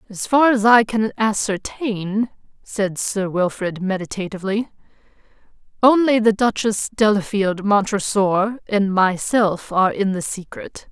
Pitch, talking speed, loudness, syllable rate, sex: 205 Hz, 115 wpm, -19 LUFS, 4.2 syllables/s, female